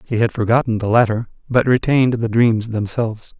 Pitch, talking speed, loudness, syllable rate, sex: 115 Hz, 175 wpm, -17 LUFS, 5.5 syllables/s, male